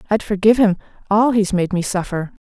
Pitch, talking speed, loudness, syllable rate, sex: 200 Hz, 195 wpm, -17 LUFS, 6.1 syllables/s, female